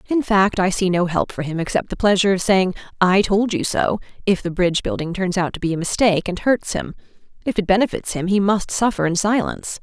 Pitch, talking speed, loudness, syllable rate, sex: 190 Hz, 240 wpm, -19 LUFS, 5.9 syllables/s, female